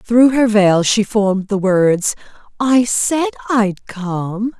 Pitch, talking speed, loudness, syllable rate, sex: 215 Hz, 145 wpm, -15 LUFS, 3.1 syllables/s, female